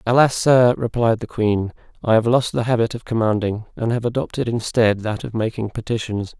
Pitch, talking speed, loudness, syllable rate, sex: 115 Hz, 190 wpm, -20 LUFS, 5.3 syllables/s, male